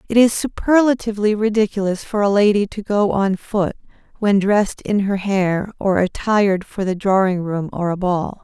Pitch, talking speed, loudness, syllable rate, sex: 200 Hz, 180 wpm, -18 LUFS, 4.9 syllables/s, female